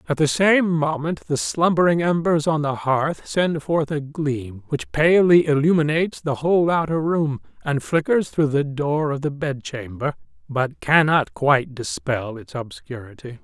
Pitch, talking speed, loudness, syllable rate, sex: 150 Hz, 155 wpm, -21 LUFS, 4.5 syllables/s, male